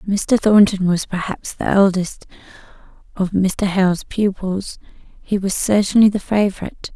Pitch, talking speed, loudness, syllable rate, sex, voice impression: 195 Hz, 130 wpm, -17 LUFS, 4.4 syllables/s, female, feminine, slightly young, slightly dark, slightly cute, calm, kind, slightly modest